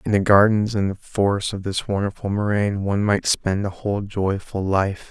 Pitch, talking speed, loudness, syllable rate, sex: 100 Hz, 190 wpm, -21 LUFS, 5.0 syllables/s, male